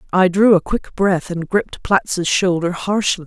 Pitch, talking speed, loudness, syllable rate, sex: 185 Hz, 185 wpm, -17 LUFS, 4.4 syllables/s, female